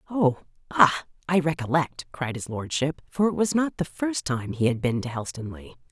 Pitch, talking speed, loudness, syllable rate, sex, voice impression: 145 Hz, 185 wpm, -25 LUFS, 5.0 syllables/s, female, slightly masculine, slightly feminine, very gender-neutral, adult-like, slightly middle-aged, slightly thick, tensed, slightly powerful, bright, slightly soft, slightly muffled, fluent, slightly raspy, cool, intellectual, slightly refreshing, slightly sincere, very calm, very friendly, reassuring, very unique, slightly wild, lively, kind